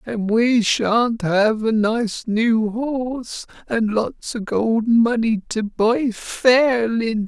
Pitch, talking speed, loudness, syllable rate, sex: 225 Hz, 130 wpm, -19 LUFS, 2.9 syllables/s, male